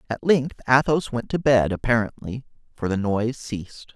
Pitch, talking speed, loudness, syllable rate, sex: 120 Hz, 165 wpm, -22 LUFS, 5.0 syllables/s, male